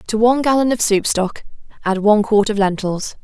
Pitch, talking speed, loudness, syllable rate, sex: 215 Hz, 205 wpm, -17 LUFS, 5.4 syllables/s, female